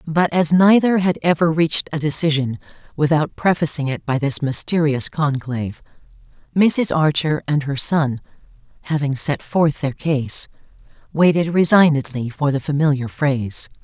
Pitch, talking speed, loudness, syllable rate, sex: 150 Hz, 135 wpm, -18 LUFS, 4.7 syllables/s, female